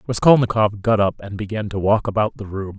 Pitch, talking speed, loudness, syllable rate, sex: 105 Hz, 215 wpm, -19 LUFS, 5.8 syllables/s, male